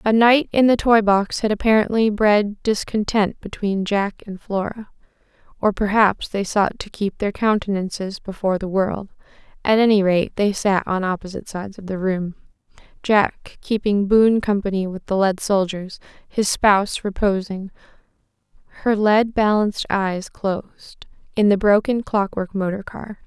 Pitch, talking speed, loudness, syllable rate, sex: 200 Hz, 145 wpm, -20 LUFS, 4.7 syllables/s, female